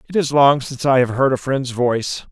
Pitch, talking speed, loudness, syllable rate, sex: 130 Hz, 260 wpm, -17 LUFS, 5.8 syllables/s, male